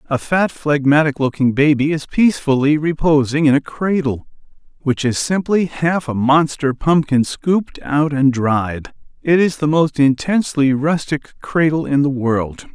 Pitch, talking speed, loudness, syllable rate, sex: 145 Hz, 150 wpm, -16 LUFS, 4.4 syllables/s, male